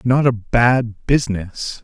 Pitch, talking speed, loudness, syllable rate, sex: 115 Hz, 130 wpm, -18 LUFS, 3.5 syllables/s, male